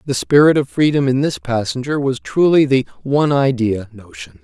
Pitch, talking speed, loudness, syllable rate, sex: 130 Hz, 175 wpm, -16 LUFS, 5.2 syllables/s, male